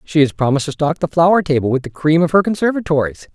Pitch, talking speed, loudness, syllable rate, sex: 155 Hz, 250 wpm, -16 LUFS, 6.9 syllables/s, male